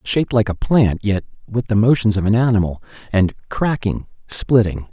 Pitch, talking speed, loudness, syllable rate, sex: 110 Hz, 170 wpm, -18 LUFS, 5.0 syllables/s, male